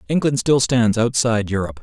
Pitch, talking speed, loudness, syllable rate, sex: 125 Hz, 165 wpm, -18 LUFS, 6.1 syllables/s, male